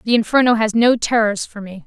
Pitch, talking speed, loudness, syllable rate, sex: 220 Hz, 225 wpm, -16 LUFS, 5.5 syllables/s, female